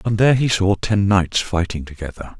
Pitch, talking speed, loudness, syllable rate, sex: 100 Hz, 200 wpm, -18 LUFS, 5.2 syllables/s, male